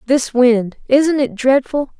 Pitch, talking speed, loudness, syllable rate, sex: 260 Hz, 120 wpm, -15 LUFS, 3.5 syllables/s, female